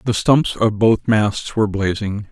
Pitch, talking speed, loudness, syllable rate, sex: 105 Hz, 180 wpm, -17 LUFS, 4.2 syllables/s, male